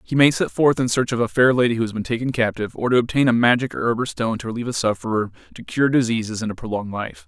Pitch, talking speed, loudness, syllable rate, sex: 120 Hz, 280 wpm, -20 LUFS, 6.9 syllables/s, male